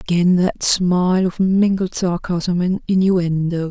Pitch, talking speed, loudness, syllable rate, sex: 180 Hz, 130 wpm, -17 LUFS, 3.9 syllables/s, female